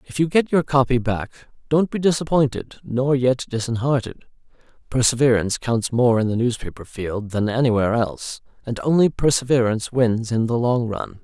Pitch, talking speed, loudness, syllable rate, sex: 125 Hz, 160 wpm, -20 LUFS, 5.3 syllables/s, male